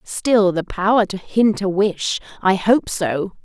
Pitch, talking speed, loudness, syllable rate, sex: 195 Hz, 175 wpm, -18 LUFS, 3.6 syllables/s, female